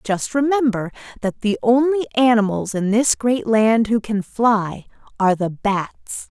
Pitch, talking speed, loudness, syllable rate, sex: 225 Hz, 150 wpm, -19 LUFS, 4.1 syllables/s, female